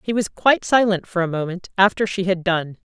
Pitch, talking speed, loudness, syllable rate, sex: 190 Hz, 225 wpm, -20 LUFS, 5.7 syllables/s, female